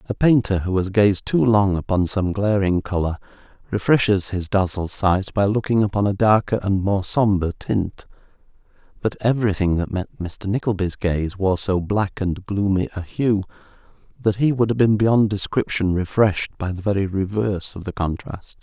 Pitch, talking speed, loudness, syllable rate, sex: 100 Hz, 170 wpm, -21 LUFS, 4.9 syllables/s, male